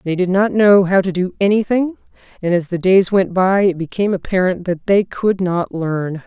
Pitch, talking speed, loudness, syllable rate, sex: 185 Hz, 210 wpm, -16 LUFS, 4.9 syllables/s, female